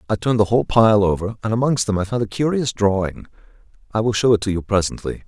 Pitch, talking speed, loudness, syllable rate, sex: 105 Hz, 240 wpm, -19 LUFS, 6.6 syllables/s, male